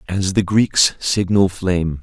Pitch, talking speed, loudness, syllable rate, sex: 95 Hz, 150 wpm, -17 LUFS, 3.8 syllables/s, male